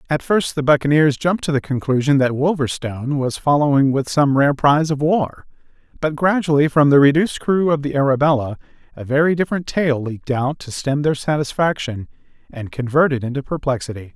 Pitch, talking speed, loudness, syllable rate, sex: 140 Hz, 180 wpm, -18 LUFS, 5.7 syllables/s, male